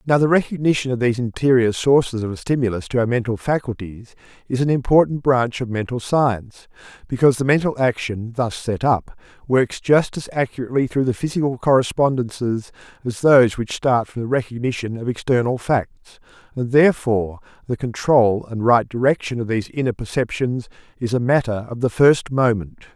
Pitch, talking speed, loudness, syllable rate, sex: 125 Hz, 165 wpm, -19 LUFS, 5.5 syllables/s, male